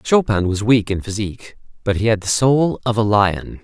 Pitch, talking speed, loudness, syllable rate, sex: 110 Hz, 215 wpm, -18 LUFS, 5.0 syllables/s, male